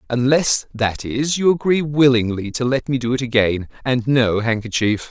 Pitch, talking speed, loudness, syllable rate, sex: 125 Hz, 175 wpm, -18 LUFS, 4.7 syllables/s, male